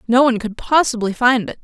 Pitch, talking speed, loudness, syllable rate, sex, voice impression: 240 Hz, 220 wpm, -16 LUFS, 6.2 syllables/s, female, feminine, slightly young, tensed, fluent, intellectual, friendly, unique, slightly sharp